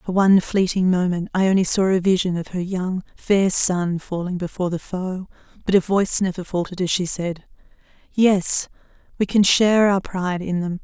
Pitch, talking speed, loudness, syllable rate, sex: 185 Hz, 185 wpm, -20 LUFS, 5.1 syllables/s, female